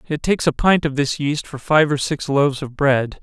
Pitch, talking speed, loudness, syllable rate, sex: 145 Hz, 260 wpm, -19 LUFS, 5.2 syllables/s, male